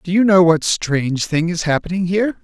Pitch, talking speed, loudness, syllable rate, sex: 175 Hz, 220 wpm, -16 LUFS, 5.6 syllables/s, male